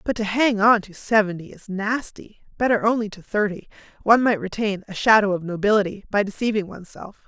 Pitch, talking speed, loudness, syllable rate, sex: 205 Hz, 180 wpm, -21 LUFS, 5.9 syllables/s, female